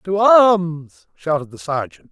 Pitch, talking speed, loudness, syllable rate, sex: 165 Hz, 140 wpm, -16 LUFS, 3.6 syllables/s, male